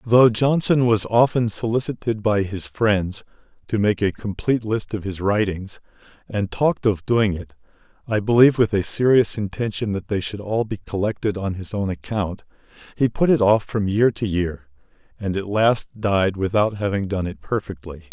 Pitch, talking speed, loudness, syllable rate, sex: 105 Hz, 180 wpm, -21 LUFS, 4.9 syllables/s, male